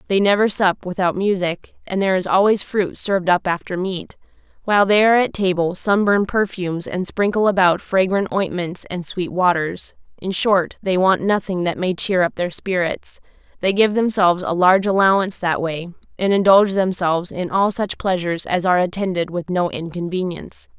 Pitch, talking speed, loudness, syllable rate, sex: 185 Hz, 175 wpm, -19 LUFS, 5.3 syllables/s, female